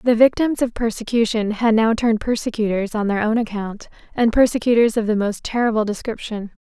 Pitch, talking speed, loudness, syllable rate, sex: 225 Hz, 170 wpm, -19 LUFS, 5.7 syllables/s, female